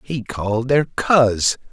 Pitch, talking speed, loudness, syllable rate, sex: 125 Hz, 140 wpm, -18 LUFS, 3.5 syllables/s, male